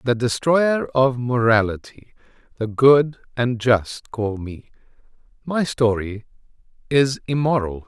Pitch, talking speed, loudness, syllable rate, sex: 120 Hz, 105 wpm, -20 LUFS, 3.7 syllables/s, male